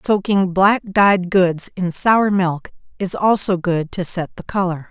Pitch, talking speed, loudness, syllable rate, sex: 185 Hz, 170 wpm, -17 LUFS, 3.9 syllables/s, female